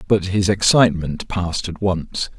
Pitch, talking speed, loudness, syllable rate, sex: 95 Hz, 150 wpm, -19 LUFS, 4.6 syllables/s, male